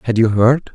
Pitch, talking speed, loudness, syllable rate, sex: 120 Hz, 240 wpm, -14 LUFS, 5.3 syllables/s, male